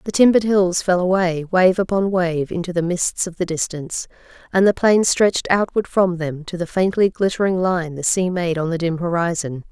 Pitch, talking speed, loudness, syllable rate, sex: 180 Hz, 205 wpm, -19 LUFS, 5.2 syllables/s, female